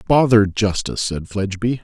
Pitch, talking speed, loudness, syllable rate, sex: 105 Hz, 130 wpm, -18 LUFS, 5.4 syllables/s, male